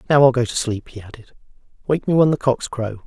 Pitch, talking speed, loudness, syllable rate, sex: 125 Hz, 255 wpm, -19 LUFS, 6.1 syllables/s, male